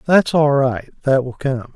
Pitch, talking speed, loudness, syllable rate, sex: 135 Hz, 170 wpm, -17 LUFS, 4.3 syllables/s, male